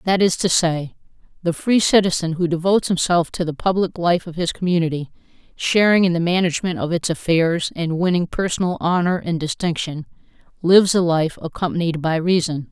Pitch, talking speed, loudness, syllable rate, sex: 170 Hz, 170 wpm, -19 LUFS, 5.5 syllables/s, female